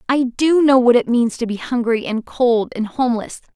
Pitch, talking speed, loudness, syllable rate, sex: 240 Hz, 220 wpm, -17 LUFS, 5.0 syllables/s, female